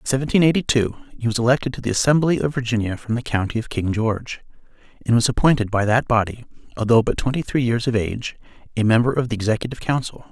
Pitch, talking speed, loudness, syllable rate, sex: 120 Hz, 215 wpm, -20 LUFS, 6.8 syllables/s, male